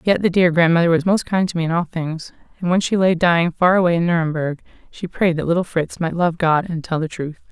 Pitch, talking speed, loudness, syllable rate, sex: 170 Hz, 265 wpm, -18 LUFS, 5.9 syllables/s, female